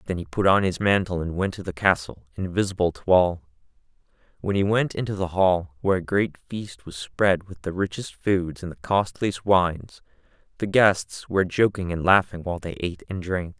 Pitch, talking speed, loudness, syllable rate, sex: 90 Hz, 200 wpm, -23 LUFS, 5.2 syllables/s, male